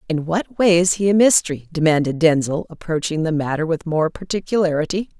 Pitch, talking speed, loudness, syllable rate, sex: 170 Hz, 175 wpm, -19 LUFS, 5.7 syllables/s, female